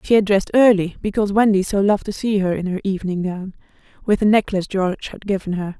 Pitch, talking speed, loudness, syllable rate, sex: 195 Hz, 230 wpm, -19 LUFS, 6.7 syllables/s, female